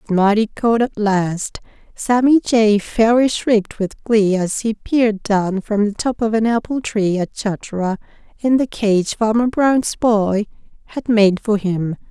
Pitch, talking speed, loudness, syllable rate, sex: 215 Hz, 165 wpm, -17 LUFS, 4.0 syllables/s, female